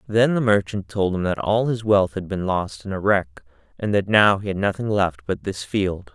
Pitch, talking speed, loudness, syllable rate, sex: 95 Hz, 245 wpm, -21 LUFS, 4.8 syllables/s, male